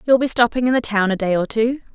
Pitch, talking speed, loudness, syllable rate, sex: 230 Hz, 310 wpm, -18 LUFS, 6.5 syllables/s, female